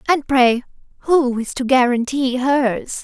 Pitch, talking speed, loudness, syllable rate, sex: 260 Hz, 140 wpm, -17 LUFS, 3.7 syllables/s, female